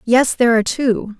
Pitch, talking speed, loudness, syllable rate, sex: 235 Hz, 200 wpm, -16 LUFS, 5.6 syllables/s, female